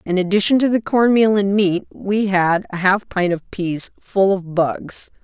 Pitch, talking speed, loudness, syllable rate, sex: 195 Hz, 205 wpm, -18 LUFS, 4.1 syllables/s, female